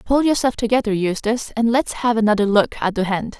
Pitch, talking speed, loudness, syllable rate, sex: 225 Hz, 210 wpm, -19 LUFS, 5.8 syllables/s, female